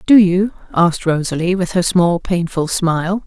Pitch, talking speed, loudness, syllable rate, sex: 175 Hz, 165 wpm, -16 LUFS, 4.8 syllables/s, female